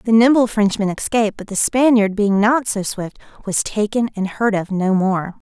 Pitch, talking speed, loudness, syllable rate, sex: 210 Hz, 195 wpm, -17 LUFS, 4.8 syllables/s, female